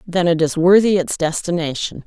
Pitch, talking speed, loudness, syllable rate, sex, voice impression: 170 Hz, 175 wpm, -17 LUFS, 5.2 syllables/s, female, slightly feminine, adult-like, slightly powerful, slightly unique